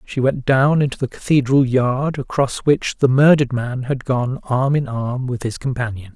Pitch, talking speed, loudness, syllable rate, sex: 130 Hz, 195 wpm, -18 LUFS, 4.7 syllables/s, male